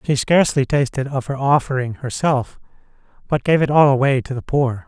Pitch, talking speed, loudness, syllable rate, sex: 135 Hz, 185 wpm, -18 LUFS, 5.5 syllables/s, male